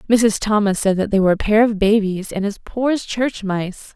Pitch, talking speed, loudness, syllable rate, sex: 210 Hz, 245 wpm, -18 LUFS, 5.1 syllables/s, female